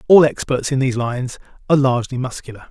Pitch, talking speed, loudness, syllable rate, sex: 130 Hz, 180 wpm, -18 LUFS, 7.2 syllables/s, male